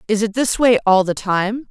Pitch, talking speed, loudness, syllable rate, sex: 215 Hz, 245 wpm, -16 LUFS, 4.9 syllables/s, female